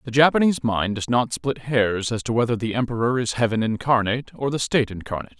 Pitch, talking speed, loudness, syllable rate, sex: 120 Hz, 210 wpm, -22 LUFS, 6.4 syllables/s, male